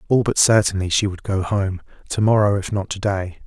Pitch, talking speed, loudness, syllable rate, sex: 100 Hz, 225 wpm, -19 LUFS, 5.3 syllables/s, male